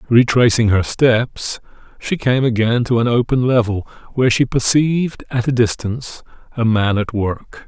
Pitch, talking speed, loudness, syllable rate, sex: 120 Hz, 155 wpm, -16 LUFS, 4.7 syllables/s, male